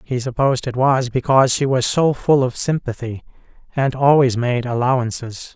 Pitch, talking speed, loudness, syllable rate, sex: 130 Hz, 160 wpm, -18 LUFS, 5.1 syllables/s, male